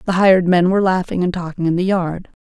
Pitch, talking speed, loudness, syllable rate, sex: 180 Hz, 245 wpm, -16 LUFS, 6.4 syllables/s, female